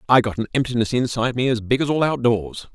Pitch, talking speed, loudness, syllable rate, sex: 120 Hz, 240 wpm, -20 LUFS, 6.5 syllables/s, male